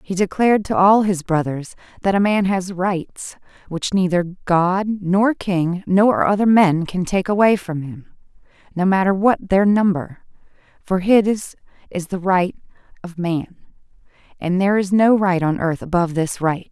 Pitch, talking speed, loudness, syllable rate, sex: 185 Hz, 165 wpm, -18 LUFS, 4.3 syllables/s, female